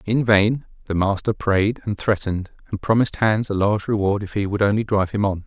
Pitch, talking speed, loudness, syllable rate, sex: 105 Hz, 220 wpm, -21 LUFS, 5.9 syllables/s, male